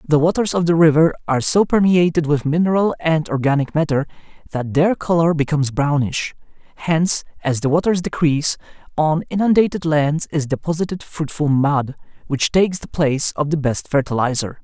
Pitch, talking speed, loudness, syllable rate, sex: 155 Hz, 155 wpm, -18 LUFS, 5.4 syllables/s, male